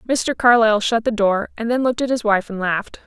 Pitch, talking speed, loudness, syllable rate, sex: 225 Hz, 255 wpm, -18 LUFS, 6.0 syllables/s, female